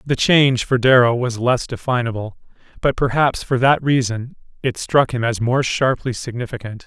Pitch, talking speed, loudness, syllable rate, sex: 125 Hz, 165 wpm, -18 LUFS, 4.9 syllables/s, male